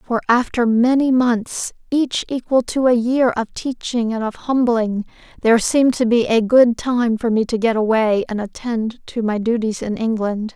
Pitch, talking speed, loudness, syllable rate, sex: 235 Hz, 175 wpm, -18 LUFS, 4.5 syllables/s, female